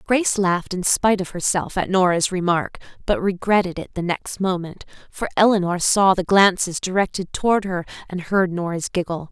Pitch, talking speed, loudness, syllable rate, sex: 185 Hz, 175 wpm, -20 LUFS, 5.3 syllables/s, female